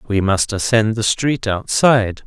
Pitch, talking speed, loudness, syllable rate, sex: 110 Hz, 160 wpm, -16 LUFS, 4.3 syllables/s, male